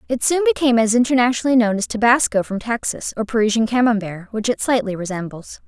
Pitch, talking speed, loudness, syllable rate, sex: 230 Hz, 180 wpm, -18 LUFS, 6.3 syllables/s, female